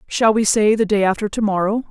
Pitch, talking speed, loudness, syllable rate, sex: 210 Hz, 250 wpm, -17 LUFS, 5.9 syllables/s, female